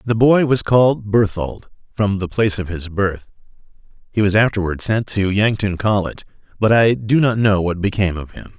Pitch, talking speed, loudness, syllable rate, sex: 105 Hz, 190 wpm, -17 LUFS, 5.3 syllables/s, male